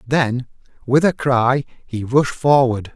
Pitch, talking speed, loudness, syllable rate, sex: 130 Hz, 140 wpm, -18 LUFS, 3.5 syllables/s, male